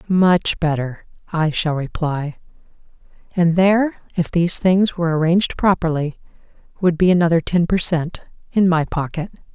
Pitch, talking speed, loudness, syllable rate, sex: 170 Hz, 130 wpm, -18 LUFS, 4.8 syllables/s, female